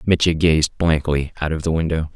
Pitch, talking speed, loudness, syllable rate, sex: 80 Hz, 195 wpm, -19 LUFS, 5.1 syllables/s, male